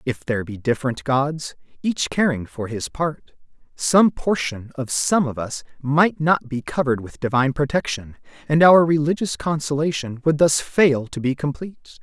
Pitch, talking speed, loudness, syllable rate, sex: 140 Hz, 165 wpm, -21 LUFS, 4.8 syllables/s, male